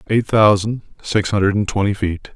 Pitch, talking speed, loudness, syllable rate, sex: 105 Hz, 155 wpm, -17 LUFS, 4.5 syllables/s, male